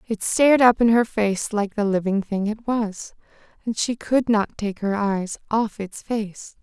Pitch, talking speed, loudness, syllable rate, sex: 215 Hz, 200 wpm, -21 LUFS, 4.1 syllables/s, female